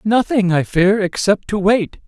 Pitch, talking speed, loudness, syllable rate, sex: 200 Hz, 175 wpm, -16 LUFS, 4.1 syllables/s, male